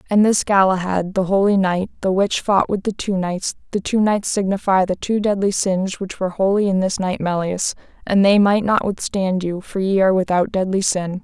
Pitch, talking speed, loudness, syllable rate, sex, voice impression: 195 Hz, 215 wpm, -19 LUFS, 5.1 syllables/s, female, feminine, slightly adult-like, muffled, calm, slightly unique, slightly kind